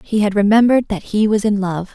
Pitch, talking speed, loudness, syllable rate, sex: 210 Hz, 245 wpm, -16 LUFS, 6.0 syllables/s, female